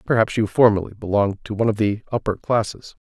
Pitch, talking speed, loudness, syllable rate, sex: 105 Hz, 195 wpm, -20 LUFS, 6.6 syllables/s, male